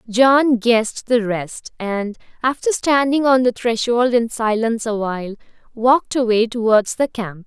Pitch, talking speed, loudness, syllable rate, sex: 235 Hz, 145 wpm, -18 LUFS, 4.4 syllables/s, female